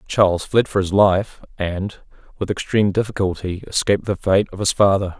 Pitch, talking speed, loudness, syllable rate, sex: 100 Hz, 175 wpm, -19 LUFS, 5.3 syllables/s, male